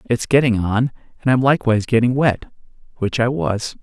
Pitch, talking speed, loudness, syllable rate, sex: 120 Hz, 155 wpm, -18 LUFS, 5.9 syllables/s, male